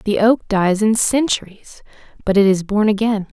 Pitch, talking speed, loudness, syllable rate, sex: 210 Hz, 175 wpm, -16 LUFS, 4.5 syllables/s, female